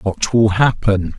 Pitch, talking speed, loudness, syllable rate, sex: 105 Hz, 150 wpm, -16 LUFS, 3.5 syllables/s, male